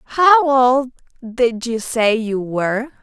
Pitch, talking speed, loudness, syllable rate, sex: 245 Hz, 140 wpm, -16 LUFS, 3.1 syllables/s, female